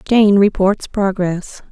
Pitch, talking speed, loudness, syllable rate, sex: 195 Hz, 105 wpm, -15 LUFS, 3.2 syllables/s, female